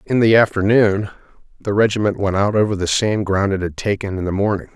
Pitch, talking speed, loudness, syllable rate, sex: 100 Hz, 215 wpm, -17 LUFS, 5.9 syllables/s, male